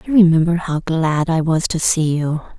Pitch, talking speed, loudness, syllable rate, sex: 165 Hz, 230 wpm, -17 LUFS, 5.1 syllables/s, female